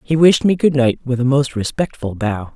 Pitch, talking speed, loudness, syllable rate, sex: 135 Hz, 235 wpm, -16 LUFS, 5.0 syllables/s, female